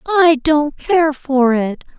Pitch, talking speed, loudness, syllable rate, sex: 290 Hz, 150 wpm, -15 LUFS, 3.6 syllables/s, female